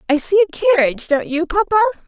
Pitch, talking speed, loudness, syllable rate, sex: 345 Hz, 200 wpm, -16 LUFS, 7.8 syllables/s, female